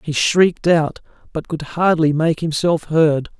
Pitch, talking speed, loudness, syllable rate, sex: 160 Hz, 160 wpm, -17 LUFS, 4.1 syllables/s, male